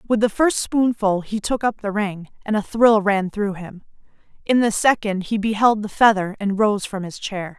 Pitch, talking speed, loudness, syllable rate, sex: 210 Hz, 215 wpm, -20 LUFS, 4.7 syllables/s, female